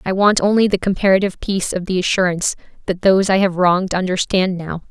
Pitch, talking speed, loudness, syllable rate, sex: 185 Hz, 195 wpm, -17 LUFS, 6.5 syllables/s, female